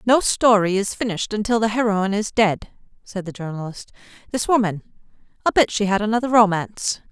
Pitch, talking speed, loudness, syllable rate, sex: 210 Hz, 160 wpm, -20 LUFS, 5.9 syllables/s, female